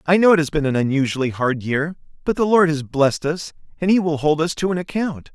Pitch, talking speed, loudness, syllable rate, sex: 155 Hz, 260 wpm, -19 LUFS, 6.0 syllables/s, male